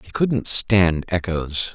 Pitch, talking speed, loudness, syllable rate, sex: 95 Hz, 140 wpm, -20 LUFS, 3.1 syllables/s, male